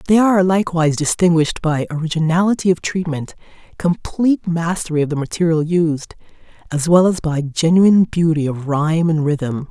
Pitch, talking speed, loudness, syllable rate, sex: 165 Hz, 150 wpm, -17 LUFS, 5.5 syllables/s, female